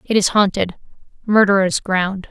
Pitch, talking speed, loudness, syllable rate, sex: 195 Hz, 130 wpm, -17 LUFS, 4.6 syllables/s, female